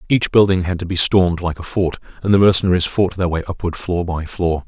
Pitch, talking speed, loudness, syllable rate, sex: 90 Hz, 245 wpm, -17 LUFS, 6.0 syllables/s, male